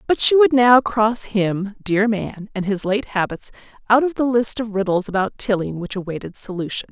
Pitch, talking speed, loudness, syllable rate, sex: 210 Hz, 180 wpm, -19 LUFS, 4.9 syllables/s, female